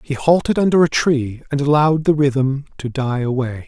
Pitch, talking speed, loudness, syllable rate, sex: 140 Hz, 195 wpm, -17 LUFS, 5.1 syllables/s, male